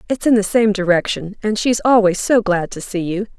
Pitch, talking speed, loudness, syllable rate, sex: 205 Hz, 230 wpm, -17 LUFS, 5.2 syllables/s, female